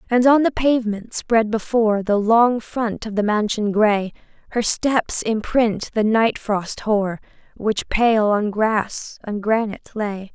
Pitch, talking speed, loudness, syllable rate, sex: 220 Hz, 155 wpm, -20 LUFS, 3.9 syllables/s, female